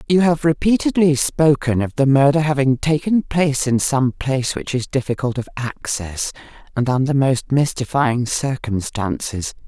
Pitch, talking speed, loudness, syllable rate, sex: 135 Hz, 145 wpm, -18 LUFS, 4.6 syllables/s, female